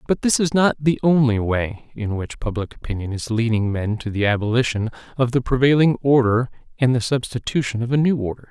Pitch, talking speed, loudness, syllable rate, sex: 120 Hz, 195 wpm, -20 LUFS, 5.6 syllables/s, male